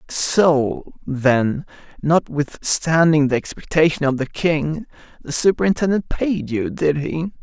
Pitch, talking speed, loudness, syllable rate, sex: 155 Hz, 115 wpm, -19 LUFS, 3.8 syllables/s, male